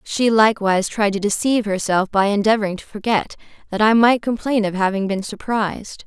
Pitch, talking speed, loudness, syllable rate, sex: 210 Hz, 180 wpm, -18 LUFS, 5.7 syllables/s, female